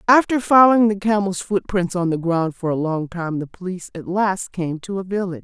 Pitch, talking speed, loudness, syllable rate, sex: 190 Hz, 220 wpm, -20 LUFS, 5.5 syllables/s, female